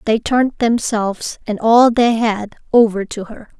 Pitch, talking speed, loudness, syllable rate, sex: 225 Hz, 165 wpm, -16 LUFS, 4.6 syllables/s, female